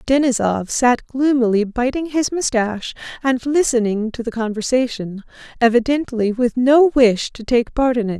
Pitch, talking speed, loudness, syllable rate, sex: 245 Hz, 145 wpm, -18 LUFS, 4.6 syllables/s, female